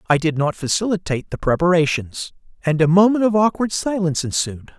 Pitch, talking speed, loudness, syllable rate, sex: 175 Hz, 165 wpm, -19 LUFS, 5.8 syllables/s, male